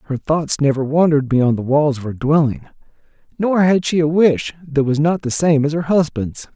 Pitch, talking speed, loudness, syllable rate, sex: 150 Hz, 210 wpm, -17 LUFS, 5.1 syllables/s, male